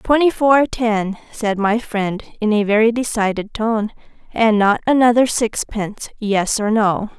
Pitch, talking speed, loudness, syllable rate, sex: 220 Hz, 140 wpm, -17 LUFS, 4.2 syllables/s, female